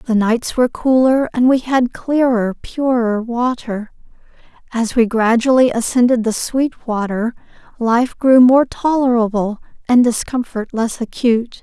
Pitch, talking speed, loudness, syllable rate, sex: 240 Hz, 125 wpm, -16 LUFS, 4.2 syllables/s, female